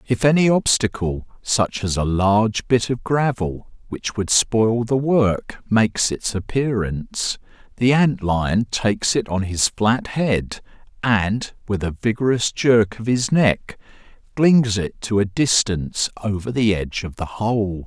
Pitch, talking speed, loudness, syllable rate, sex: 110 Hz, 155 wpm, -20 LUFS, 3.9 syllables/s, male